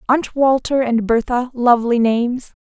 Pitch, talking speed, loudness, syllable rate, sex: 245 Hz, 135 wpm, -17 LUFS, 5.1 syllables/s, female